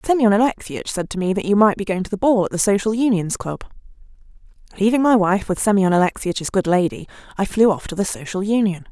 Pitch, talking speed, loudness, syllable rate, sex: 200 Hz, 220 wpm, -19 LUFS, 6.0 syllables/s, female